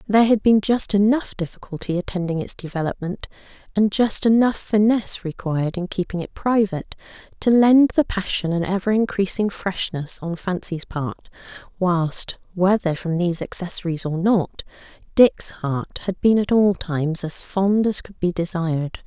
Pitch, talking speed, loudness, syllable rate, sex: 190 Hz, 155 wpm, -21 LUFS, 4.8 syllables/s, female